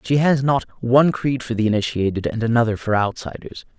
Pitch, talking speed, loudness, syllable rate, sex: 120 Hz, 190 wpm, -19 LUFS, 5.9 syllables/s, male